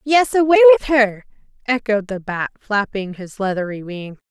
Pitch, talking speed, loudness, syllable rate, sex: 215 Hz, 155 wpm, -17 LUFS, 4.8 syllables/s, female